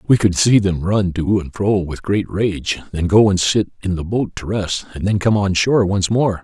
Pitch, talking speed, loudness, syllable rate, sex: 95 Hz, 250 wpm, -17 LUFS, 4.8 syllables/s, male